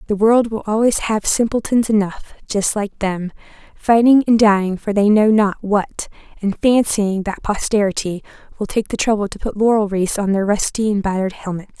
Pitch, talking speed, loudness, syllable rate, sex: 210 Hz, 185 wpm, -17 LUFS, 5.1 syllables/s, female